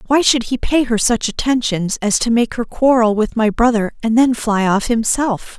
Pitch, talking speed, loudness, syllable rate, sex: 230 Hz, 215 wpm, -16 LUFS, 4.7 syllables/s, female